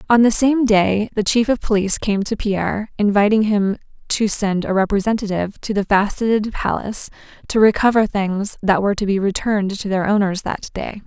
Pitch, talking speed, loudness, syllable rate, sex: 205 Hz, 185 wpm, -18 LUFS, 5.4 syllables/s, female